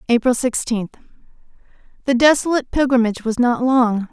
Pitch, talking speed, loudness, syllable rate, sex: 245 Hz, 100 wpm, -17 LUFS, 5.7 syllables/s, female